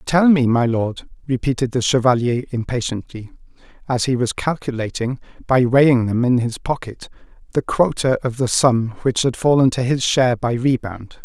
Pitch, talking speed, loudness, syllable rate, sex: 125 Hz, 165 wpm, -18 LUFS, 5.0 syllables/s, male